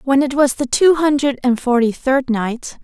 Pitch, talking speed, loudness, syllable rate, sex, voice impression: 265 Hz, 210 wpm, -16 LUFS, 4.5 syllables/s, female, feminine, slightly gender-neutral, slightly young, slightly adult-like, thin, slightly tensed, slightly weak, bright, slightly hard, slightly muffled, slightly halting, raspy, cute, intellectual, sincere, calm, slightly friendly, very unique, sweet, slightly lively, kind, slightly modest